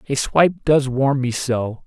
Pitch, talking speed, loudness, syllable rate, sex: 135 Hz, 195 wpm, -19 LUFS, 4.5 syllables/s, male